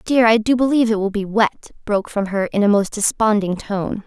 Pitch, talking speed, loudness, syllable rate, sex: 210 Hz, 235 wpm, -18 LUFS, 5.4 syllables/s, female